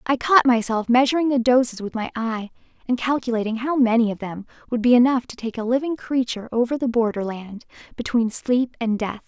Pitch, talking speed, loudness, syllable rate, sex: 240 Hz, 200 wpm, -21 LUFS, 5.7 syllables/s, female